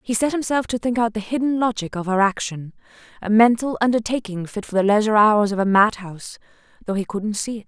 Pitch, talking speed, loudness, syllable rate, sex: 215 Hz, 210 wpm, -20 LUFS, 6.1 syllables/s, female